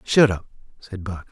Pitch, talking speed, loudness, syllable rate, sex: 100 Hz, 185 wpm, -22 LUFS, 4.5 syllables/s, male